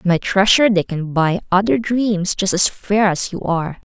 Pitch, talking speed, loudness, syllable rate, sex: 190 Hz, 215 wpm, -17 LUFS, 5.1 syllables/s, female